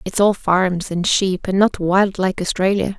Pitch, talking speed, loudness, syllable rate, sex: 190 Hz, 200 wpm, -18 LUFS, 4.2 syllables/s, female